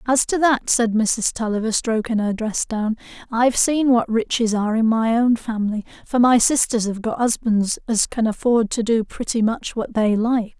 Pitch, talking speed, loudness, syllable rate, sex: 230 Hz, 200 wpm, -19 LUFS, 4.8 syllables/s, female